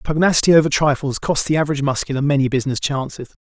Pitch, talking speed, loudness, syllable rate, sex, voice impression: 140 Hz, 175 wpm, -17 LUFS, 7.3 syllables/s, male, masculine, very adult-like, slightly muffled, fluent, cool